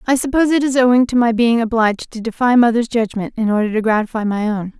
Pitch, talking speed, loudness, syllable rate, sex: 230 Hz, 240 wpm, -16 LUFS, 6.5 syllables/s, female